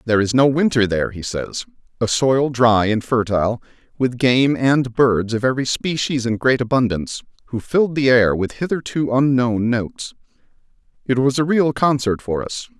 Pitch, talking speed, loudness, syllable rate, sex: 125 Hz, 175 wpm, -18 LUFS, 5.0 syllables/s, male